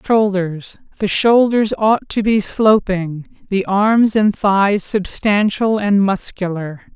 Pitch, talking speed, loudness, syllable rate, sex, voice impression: 200 Hz, 110 wpm, -16 LUFS, 3.3 syllables/s, female, feminine, adult-like, tensed, powerful, hard, slightly muffled, unique, slightly lively, slightly sharp